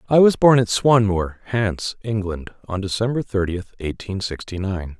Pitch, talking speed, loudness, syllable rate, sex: 105 Hz, 155 wpm, -20 LUFS, 4.6 syllables/s, male